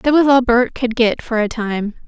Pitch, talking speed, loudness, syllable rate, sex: 235 Hz, 260 wpm, -16 LUFS, 4.6 syllables/s, female